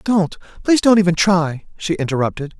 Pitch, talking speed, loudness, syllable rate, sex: 175 Hz, 140 wpm, -17 LUFS, 5.7 syllables/s, male